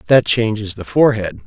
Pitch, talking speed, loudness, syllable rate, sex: 110 Hz, 165 wpm, -16 LUFS, 5.6 syllables/s, male